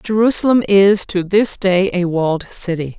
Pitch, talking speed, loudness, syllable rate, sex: 190 Hz, 160 wpm, -15 LUFS, 4.5 syllables/s, female